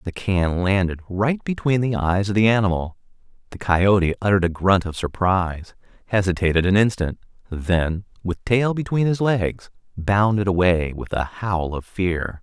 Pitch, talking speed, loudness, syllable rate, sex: 95 Hz, 160 wpm, -21 LUFS, 4.7 syllables/s, male